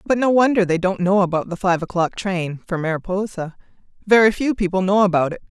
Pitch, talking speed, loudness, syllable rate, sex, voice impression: 190 Hz, 205 wpm, -19 LUFS, 5.8 syllables/s, female, feminine, adult-like, slightly fluent, sincere, slightly calm, friendly, slightly reassuring